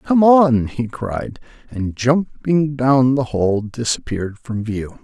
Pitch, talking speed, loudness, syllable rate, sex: 125 Hz, 145 wpm, -18 LUFS, 3.5 syllables/s, male